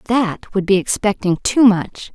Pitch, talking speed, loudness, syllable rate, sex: 205 Hz, 170 wpm, -16 LUFS, 4.2 syllables/s, female